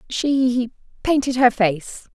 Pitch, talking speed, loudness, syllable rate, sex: 245 Hz, 110 wpm, -19 LUFS, 3.2 syllables/s, female